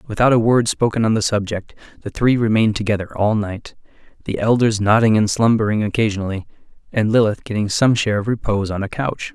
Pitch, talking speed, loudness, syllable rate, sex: 110 Hz, 185 wpm, -18 LUFS, 6.2 syllables/s, male